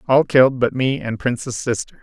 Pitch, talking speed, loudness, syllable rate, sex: 125 Hz, 210 wpm, -18 LUFS, 5.4 syllables/s, male